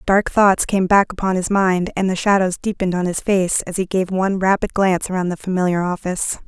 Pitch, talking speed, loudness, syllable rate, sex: 185 Hz, 220 wpm, -18 LUFS, 5.6 syllables/s, female